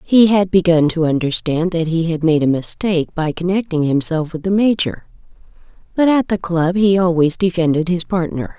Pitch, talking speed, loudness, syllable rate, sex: 170 Hz, 180 wpm, -16 LUFS, 5.1 syllables/s, female